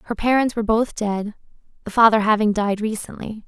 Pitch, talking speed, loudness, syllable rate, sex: 215 Hz, 175 wpm, -19 LUFS, 5.7 syllables/s, female